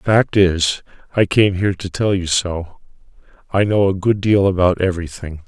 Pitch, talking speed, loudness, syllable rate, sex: 95 Hz, 165 wpm, -17 LUFS, 5.1 syllables/s, male